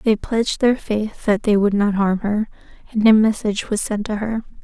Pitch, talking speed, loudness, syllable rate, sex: 210 Hz, 220 wpm, -19 LUFS, 5.1 syllables/s, female